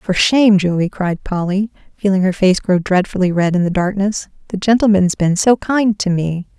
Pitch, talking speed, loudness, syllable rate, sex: 190 Hz, 190 wpm, -15 LUFS, 4.8 syllables/s, female